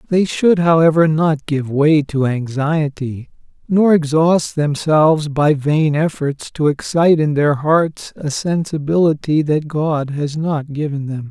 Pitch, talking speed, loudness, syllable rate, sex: 150 Hz, 145 wpm, -16 LUFS, 3.9 syllables/s, male